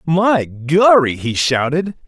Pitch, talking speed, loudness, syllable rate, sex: 160 Hz, 115 wpm, -15 LUFS, 3.3 syllables/s, male